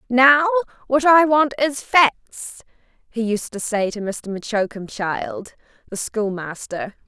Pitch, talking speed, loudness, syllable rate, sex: 230 Hz, 125 wpm, -19 LUFS, 3.4 syllables/s, female